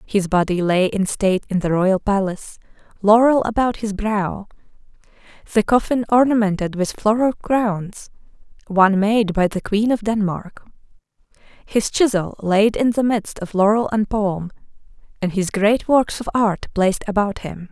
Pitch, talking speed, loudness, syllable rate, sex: 205 Hz, 150 wpm, -19 LUFS, 4.6 syllables/s, female